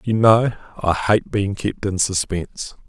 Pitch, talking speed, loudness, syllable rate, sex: 100 Hz, 165 wpm, -20 LUFS, 4.2 syllables/s, male